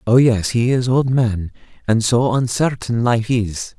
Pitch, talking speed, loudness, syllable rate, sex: 115 Hz, 160 wpm, -17 LUFS, 3.9 syllables/s, male